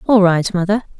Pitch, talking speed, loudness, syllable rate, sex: 195 Hz, 180 wpm, -15 LUFS, 5.9 syllables/s, female